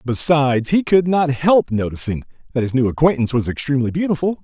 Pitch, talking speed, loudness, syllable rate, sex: 145 Hz, 175 wpm, -17 LUFS, 6.2 syllables/s, male